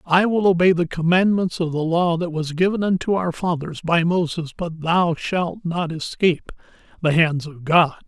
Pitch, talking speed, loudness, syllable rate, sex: 170 Hz, 185 wpm, -20 LUFS, 4.6 syllables/s, male